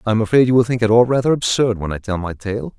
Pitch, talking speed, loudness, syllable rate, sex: 110 Hz, 325 wpm, -17 LUFS, 6.7 syllables/s, male